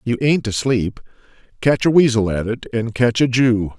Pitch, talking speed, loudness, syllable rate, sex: 120 Hz, 190 wpm, -18 LUFS, 4.6 syllables/s, male